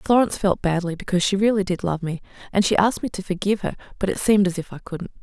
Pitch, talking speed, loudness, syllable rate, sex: 190 Hz, 265 wpm, -22 LUFS, 7.5 syllables/s, female